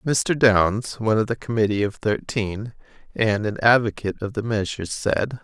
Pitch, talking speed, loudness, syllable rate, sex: 110 Hz, 165 wpm, -22 LUFS, 4.9 syllables/s, male